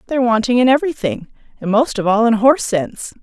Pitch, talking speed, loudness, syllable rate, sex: 235 Hz, 205 wpm, -15 LUFS, 6.7 syllables/s, female